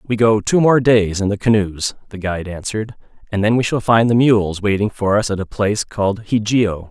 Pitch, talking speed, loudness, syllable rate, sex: 105 Hz, 225 wpm, -17 LUFS, 5.3 syllables/s, male